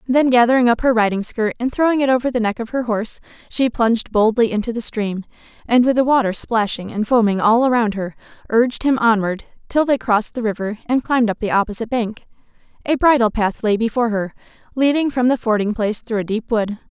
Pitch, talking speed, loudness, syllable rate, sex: 230 Hz, 210 wpm, -18 LUFS, 6.1 syllables/s, female